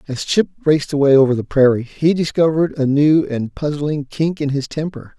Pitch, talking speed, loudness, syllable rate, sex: 145 Hz, 195 wpm, -17 LUFS, 5.4 syllables/s, male